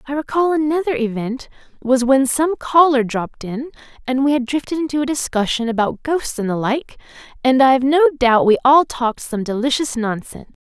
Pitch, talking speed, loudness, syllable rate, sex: 265 Hz, 175 wpm, -17 LUFS, 5.4 syllables/s, female